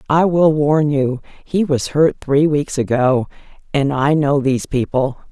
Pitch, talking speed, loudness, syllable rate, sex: 140 Hz, 160 wpm, -16 LUFS, 4.1 syllables/s, female